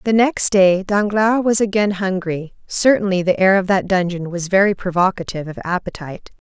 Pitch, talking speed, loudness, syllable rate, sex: 190 Hz, 165 wpm, -17 LUFS, 5.3 syllables/s, female